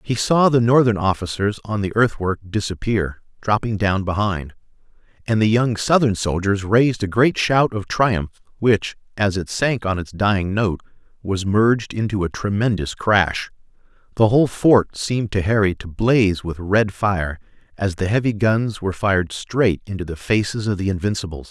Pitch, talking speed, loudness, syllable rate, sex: 100 Hz, 170 wpm, -19 LUFS, 4.8 syllables/s, male